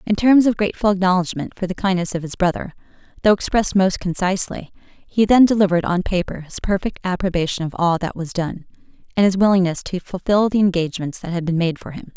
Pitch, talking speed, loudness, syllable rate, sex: 185 Hz, 200 wpm, -19 LUFS, 6.3 syllables/s, female